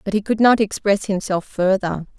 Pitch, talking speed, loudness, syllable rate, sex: 200 Hz, 190 wpm, -19 LUFS, 5.0 syllables/s, female